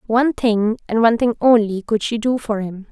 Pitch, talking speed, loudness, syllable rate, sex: 225 Hz, 225 wpm, -18 LUFS, 5.5 syllables/s, female